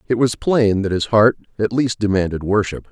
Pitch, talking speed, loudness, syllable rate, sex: 110 Hz, 205 wpm, -18 LUFS, 5.1 syllables/s, male